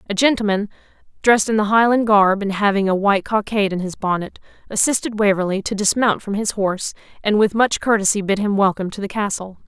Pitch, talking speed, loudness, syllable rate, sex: 205 Hz, 200 wpm, -18 LUFS, 6.3 syllables/s, female